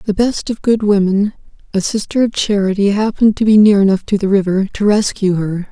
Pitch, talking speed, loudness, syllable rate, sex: 200 Hz, 190 wpm, -14 LUFS, 5.6 syllables/s, female